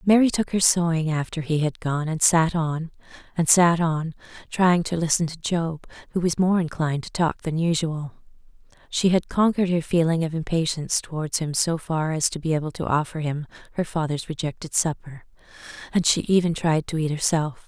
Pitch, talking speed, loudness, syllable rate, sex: 165 Hz, 190 wpm, -23 LUFS, 5.3 syllables/s, female